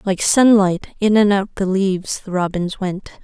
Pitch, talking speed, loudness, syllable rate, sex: 195 Hz, 185 wpm, -17 LUFS, 4.6 syllables/s, female